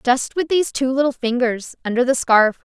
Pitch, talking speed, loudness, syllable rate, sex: 255 Hz, 200 wpm, -18 LUFS, 5.3 syllables/s, female